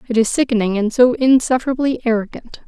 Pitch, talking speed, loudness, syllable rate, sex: 240 Hz, 155 wpm, -16 LUFS, 6.3 syllables/s, female